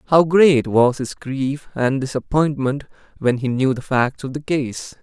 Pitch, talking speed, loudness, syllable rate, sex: 135 Hz, 180 wpm, -19 LUFS, 4.1 syllables/s, male